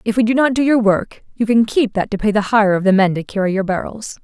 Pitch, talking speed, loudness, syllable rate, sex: 215 Hz, 310 wpm, -16 LUFS, 6.1 syllables/s, female